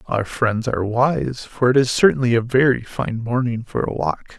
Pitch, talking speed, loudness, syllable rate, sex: 120 Hz, 205 wpm, -19 LUFS, 4.9 syllables/s, male